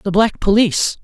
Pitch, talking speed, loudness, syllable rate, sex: 205 Hz, 175 wpm, -15 LUFS, 5.2 syllables/s, male